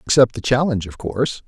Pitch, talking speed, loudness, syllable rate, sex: 115 Hz, 205 wpm, -19 LUFS, 6.3 syllables/s, male